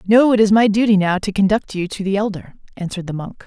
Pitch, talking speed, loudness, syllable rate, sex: 200 Hz, 260 wpm, -17 LUFS, 6.5 syllables/s, female